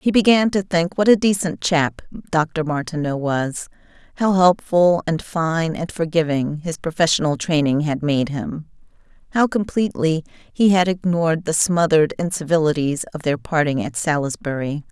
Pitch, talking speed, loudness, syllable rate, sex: 165 Hz, 145 wpm, -19 LUFS, 4.6 syllables/s, female